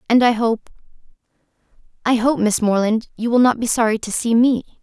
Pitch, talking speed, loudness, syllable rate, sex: 230 Hz, 175 wpm, -18 LUFS, 5.5 syllables/s, female